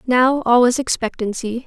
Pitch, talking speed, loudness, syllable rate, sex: 245 Hz, 145 wpm, -17 LUFS, 4.7 syllables/s, female